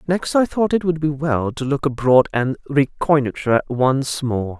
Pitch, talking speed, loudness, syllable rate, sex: 140 Hz, 185 wpm, -19 LUFS, 4.3 syllables/s, male